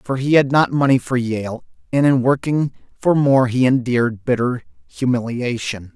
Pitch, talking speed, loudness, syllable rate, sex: 125 Hz, 160 wpm, -18 LUFS, 4.6 syllables/s, male